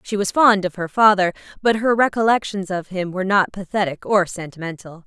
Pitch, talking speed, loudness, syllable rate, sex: 195 Hz, 190 wpm, -19 LUFS, 5.6 syllables/s, female